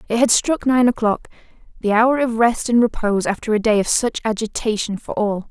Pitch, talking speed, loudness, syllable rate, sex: 225 Hz, 195 wpm, -18 LUFS, 5.5 syllables/s, female